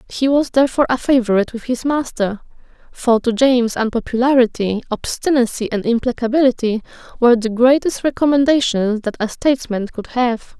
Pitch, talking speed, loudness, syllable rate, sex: 245 Hz, 135 wpm, -17 LUFS, 5.7 syllables/s, female